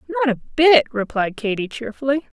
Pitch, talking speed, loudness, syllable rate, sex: 260 Hz, 150 wpm, -19 LUFS, 5.6 syllables/s, female